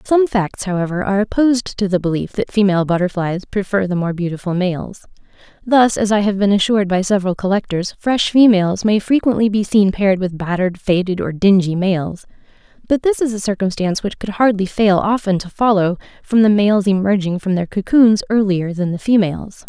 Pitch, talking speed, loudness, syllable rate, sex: 200 Hz, 185 wpm, -16 LUFS, 5.6 syllables/s, female